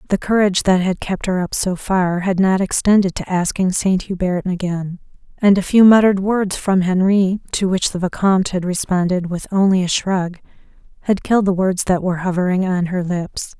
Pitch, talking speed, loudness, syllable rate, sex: 185 Hz, 195 wpm, -17 LUFS, 5.2 syllables/s, female